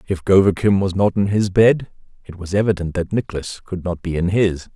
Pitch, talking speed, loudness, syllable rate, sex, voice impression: 95 Hz, 215 wpm, -18 LUFS, 5.2 syllables/s, male, very masculine, very adult-like, slightly middle-aged, very thick, tensed, powerful, slightly bright, soft, slightly muffled, fluent, very cool, very intellectual, slightly sincere, very calm, very mature, very friendly, very reassuring, very elegant, slightly wild, very sweet, slightly lively, very kind